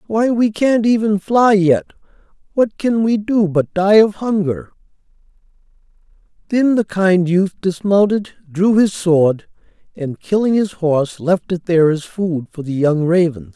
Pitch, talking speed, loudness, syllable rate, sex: 190 Hz, 155 wpm, -16 LUFS, 4.3 syllables/s, male